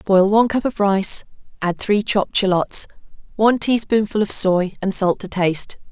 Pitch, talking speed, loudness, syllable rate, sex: 200 Hz, 170 wpm, -18 LUFS, 5.0 syllables/s, female